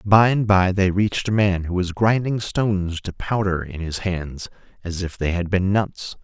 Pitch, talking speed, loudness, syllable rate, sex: 95 Hz, 210 wpm, -21 LUFS, 4.5 syllables/s, male